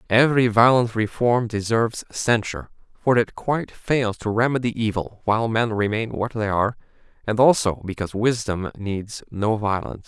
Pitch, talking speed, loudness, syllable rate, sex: 110 Hz, 150 wpm, -22 LUFS, 5.2 syllables/s, male